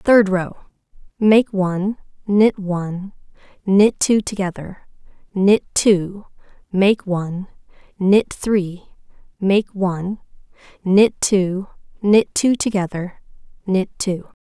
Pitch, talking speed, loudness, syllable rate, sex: 195 Hz, 95 wpm, -18 LUFS, 3.5 syllables/s, female